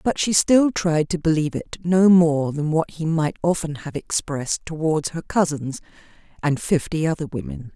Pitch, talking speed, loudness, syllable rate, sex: 155 Hz, 180 wpm, -21 LUFS, 4.8 syllables/s, female